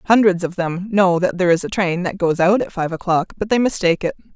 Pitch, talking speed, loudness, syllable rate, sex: 185 Hz, 260 wpm, -18 LUFS, 6.1 syllables/s, female